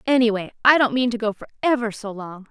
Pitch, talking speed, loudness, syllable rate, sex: 230 Hz, 240 wpm, -20 LUFS, 6.1 syllables/s, female